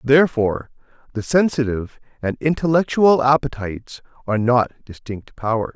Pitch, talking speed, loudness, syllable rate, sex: 130 Hz, 105 wpm, -19 LUFS, 5.4 syllables/s, male